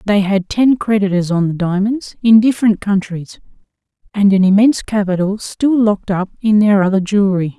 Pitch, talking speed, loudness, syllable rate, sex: 205 Hz, 165 wpm, -14 LUFS, 5.3 syllables/s, female